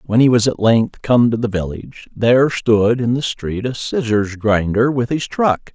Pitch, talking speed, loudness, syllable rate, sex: 115 Hz, 210 wpm, -16 LUFS, 4.5 syllables/s, male